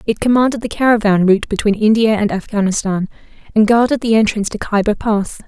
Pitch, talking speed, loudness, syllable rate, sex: 215 Hz, 175 wpm, -15 LUFS, 6.3 syllables/s, female